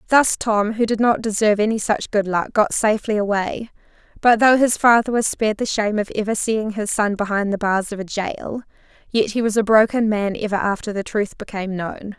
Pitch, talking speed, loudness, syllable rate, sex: 215 Hz, 215 wpm, -19 LUFS, 5.5 syllables/s, female